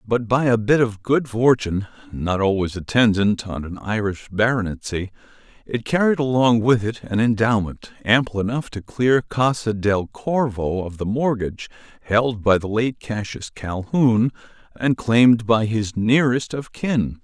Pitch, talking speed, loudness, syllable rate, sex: 115 Hz, 145 wpm, -20 LUFS, 4.5 syllables/s, male